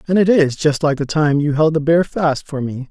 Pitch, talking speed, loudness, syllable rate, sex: 150 Hz, 290 wpm, -16 LUFS, 5.1 syllables/s, male